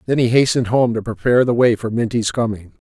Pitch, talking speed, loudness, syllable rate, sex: 115 Hz, 230 wpm, -17 LUFS, 6.5 syllables/s, male